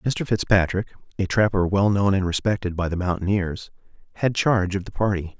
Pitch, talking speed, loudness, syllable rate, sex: 95 Hz, 180 wpm, -22 LUFS, 5.5 syllables/s, male